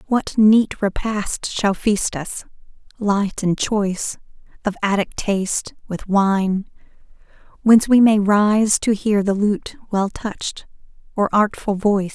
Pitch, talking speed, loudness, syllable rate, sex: 205 Hz, 135 wpm, -19 LUFS, 3.7 syllables/s, female